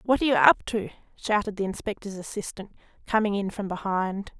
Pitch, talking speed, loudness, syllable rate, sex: 205 Hz, 180 wpm, -26 LUFS, 5.7 syllables/s, female